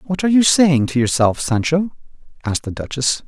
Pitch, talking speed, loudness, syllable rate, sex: 145 Hz, 185 wpm, -17 LUFS, 5.5 syllables/s, male